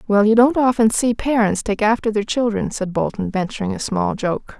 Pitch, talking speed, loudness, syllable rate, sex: 215 Hz, 210 wpm, -18 LUFS, 5.2 syllables/s, female